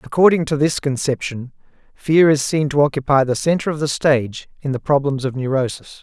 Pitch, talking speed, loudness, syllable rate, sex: 140 Hz, 190 wpm, -18 LUFS, 5.6 syllables/s, male